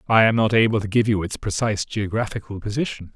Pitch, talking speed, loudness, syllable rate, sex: 105 Hz, 210 wpm, -21 LUFS, 6.4 syllables/s, male